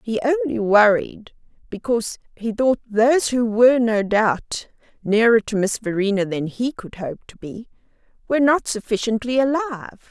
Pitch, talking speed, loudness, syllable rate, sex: 230 Hz, 150 wpm, -20 LUFS, 5.1 syllables/s, female